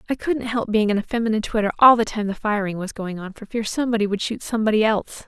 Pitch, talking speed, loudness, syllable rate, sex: 215 Hz, 260 wpm, -21 LUFS, 7.0 syllables/s, female